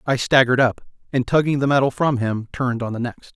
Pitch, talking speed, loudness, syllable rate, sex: 130 Hz, 230 wpm, -20 LUFS, 6.2 syllables/s, male